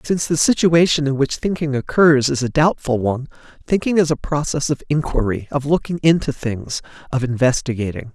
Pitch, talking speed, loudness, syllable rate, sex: 140 Hz, 170 wpm, -18 LUFS, 5.5 syllables/s, male